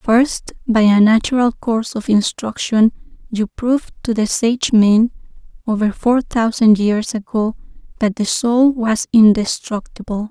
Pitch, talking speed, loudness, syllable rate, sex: 225 Hz, 130 wpm, -16 LUFS, 4.3 syllables/s, female